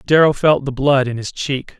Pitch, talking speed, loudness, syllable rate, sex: 135 Hz, 235 wpm, -16 LUFS, 4.8 syllables/s, male